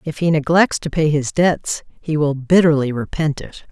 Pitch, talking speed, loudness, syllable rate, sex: 155 Hz, 195 wpm, -17 LUFS, 4.6 syllables/s, female